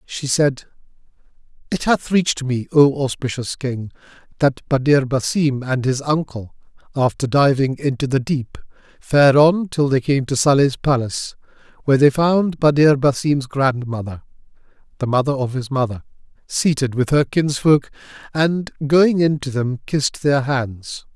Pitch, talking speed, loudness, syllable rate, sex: 140 Hz, 145 wpm, -18 LUFS, 4.4 syllables/s, male